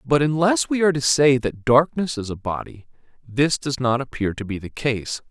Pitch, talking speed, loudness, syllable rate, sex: 135 Hz, 215 wpm, -21 LUFS, 5.0 syllables/s, male